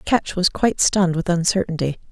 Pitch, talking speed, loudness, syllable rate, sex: 180 Hz, 170 wpm, -19 LUFS, 5.7 syllables/s, female